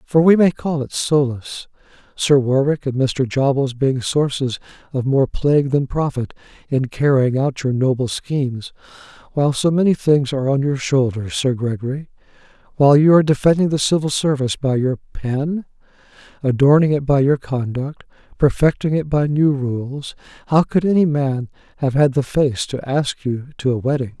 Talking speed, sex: 165 wpm, male